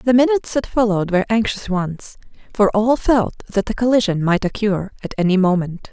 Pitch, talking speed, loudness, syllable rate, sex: 210 Hz, 180 wpm, -18 LUFS, 5.5 syllables/s, female